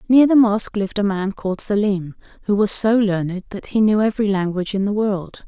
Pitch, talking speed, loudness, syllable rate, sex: 205 Hz, 220 wpm, -19 LUFS, 5.7 syllables/s, female